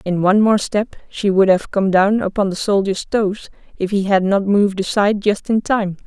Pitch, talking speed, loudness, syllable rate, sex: 200 Hz, 220 wpm, -17 LUFS, 5.2 syllables/s, female